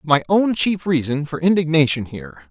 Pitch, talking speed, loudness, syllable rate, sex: 155 Hz, 170 wpm, -18 LUFS, 5.2 syllables/s, male